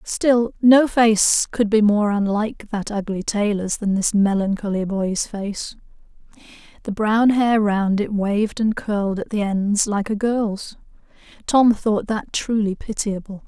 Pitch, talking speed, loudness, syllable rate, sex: 210 Hz, 145 wpm, -20 LUFS, 4.0 syllables/s, female